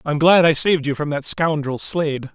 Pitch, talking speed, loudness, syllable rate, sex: 155 Hz, 230 wpm, -18 LUFS, 5.3 syllables/s, male